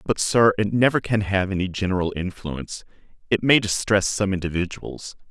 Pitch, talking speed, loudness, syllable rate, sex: 100 Hz, 160 wpm, -22 LUFS, 5.3 syllables/s, male